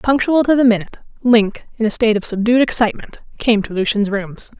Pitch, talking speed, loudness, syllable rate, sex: 225 Hz, 195 wpm, -16 LUFS, 6.0 syllables/s, female